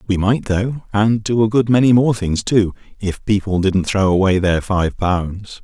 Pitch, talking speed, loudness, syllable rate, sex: 100 Hz, 200 wpm, -17 LUFS, 4.3 syllables/s, male